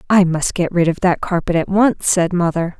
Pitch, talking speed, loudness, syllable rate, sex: 180 Hz, 235 wpm, -16 LUFS, 5.0 syllables/s, female